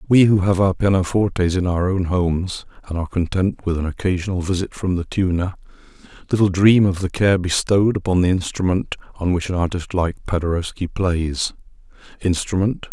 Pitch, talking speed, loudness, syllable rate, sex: 90 Hz, 165 wpm, -20 LUFS, 5.4 syllables/s, male